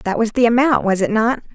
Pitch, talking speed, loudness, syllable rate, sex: 230 Hz, 270 wpm, -16 LUFS, 5.6 syllables/s, female